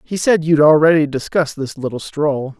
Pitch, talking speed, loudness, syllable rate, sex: 150 Hz, 185 wpm, -16 LUFS, 5.2 syllables/s, male